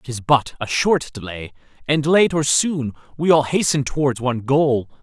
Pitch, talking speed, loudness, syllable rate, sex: 135 Hz, 180 wpm, -19 LUFS, 4.5 syllables/s, male